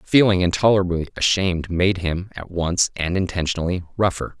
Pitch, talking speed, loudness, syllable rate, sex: 90 Hz, 135 wpm, -20 LUFS, 5.5 syllables/s, male